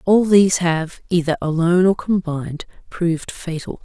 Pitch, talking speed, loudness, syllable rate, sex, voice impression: 175 Hz, 140 wpm, -18 LUFS, 5.0 syllables/s, female, very feminine, slightly old, slightly thin, slightly tensed, slightly weak, slightly dark, slightly soft, clear, slightly fluent, raspy, slightly cool, intellectual, slightly refreshing, sincere, very calm, slightly friendly, slightly reassuring, unique, elegant, sweet, lively, slightly kind, slightly strict, slightly intense, slightly modest